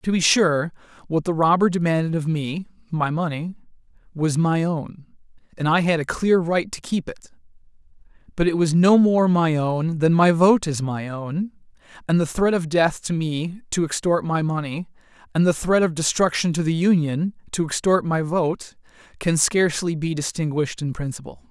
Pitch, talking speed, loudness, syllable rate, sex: 165 Hz, 180 wpm, -21 LUFS, 4.8 syllables/s, male